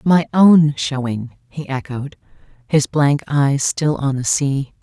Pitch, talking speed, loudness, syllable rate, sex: 140 Hz, 150 wpm, -17 LUFS, 3.5 syllables/s, female